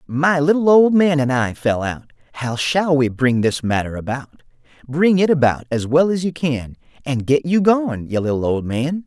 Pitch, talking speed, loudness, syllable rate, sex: 145 Hz, 205 wpm, -18 LUFS, 4.6 syllables/s, male